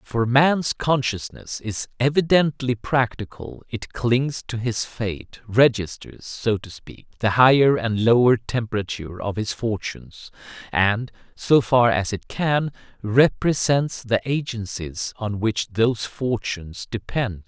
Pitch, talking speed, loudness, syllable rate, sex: 115 Hz, 125 wpm, -22 LUFS, 3.9 syllables/s, male